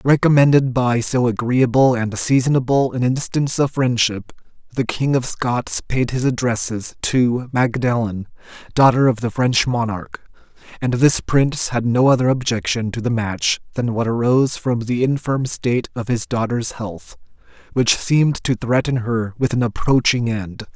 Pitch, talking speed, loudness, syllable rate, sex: 120 Hz, 155 wpm, -18 LUFS, 4.6 syllables/s, male